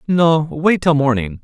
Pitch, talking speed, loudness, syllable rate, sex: 150 Hz, 170 wpm, -15 LUFS, 4.0 syllables/s, male